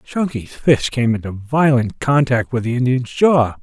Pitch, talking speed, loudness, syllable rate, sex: 125 Hz, 165 wpm, -17 LUFS, 4.3 syllables/s, male